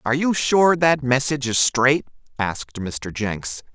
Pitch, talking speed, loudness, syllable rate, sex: 130 Hz, 160 wpm, -20 LUFS, 4.3 syllables/s, male